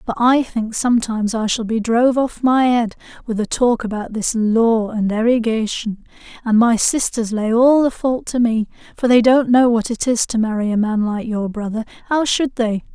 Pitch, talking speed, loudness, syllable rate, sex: 230 Hz, 210 wpm, -17 LUFS, 4.9 syllables/s, female